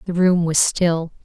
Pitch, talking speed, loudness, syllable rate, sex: 170 Hz, 195 wpm, -18 LUFS, 4.0 syllables/s, female